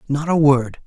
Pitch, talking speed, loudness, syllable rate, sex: 140 Hz, 210 wpm, -17 LUFS, 4.4 syllables/s, male